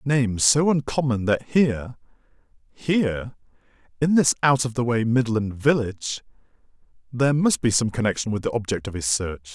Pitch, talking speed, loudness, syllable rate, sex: 120 Hz, 150 wpm, -22 LUFS, 5.3 syllables/s, male